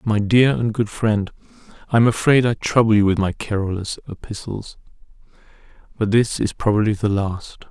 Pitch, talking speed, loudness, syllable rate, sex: 110 Hz, 165 wpm, -19 LUFS, 5.1 syllables/s, male